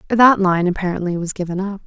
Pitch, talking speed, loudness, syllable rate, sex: 190 Hz, 195 wpm, -18 LUFS, 6.2 syllables/s, female